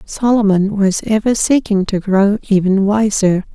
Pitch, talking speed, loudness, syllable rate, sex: 205 Hz, 135 wpm, -14 LUFS, 4.3 syllables/s, female